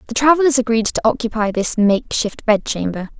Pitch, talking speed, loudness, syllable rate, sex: 225 Hz, 170 wpm, -17 LUFS, 5.8 syllables/s, female